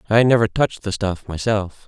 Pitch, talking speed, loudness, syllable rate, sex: 105 Hz, 190 wpm, -20 LUFS, 4.8 syllables/s, male